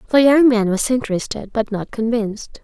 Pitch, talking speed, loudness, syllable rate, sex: 225 Hz, 180 wpm, -18 LUFS, 5.4 syllables/s, female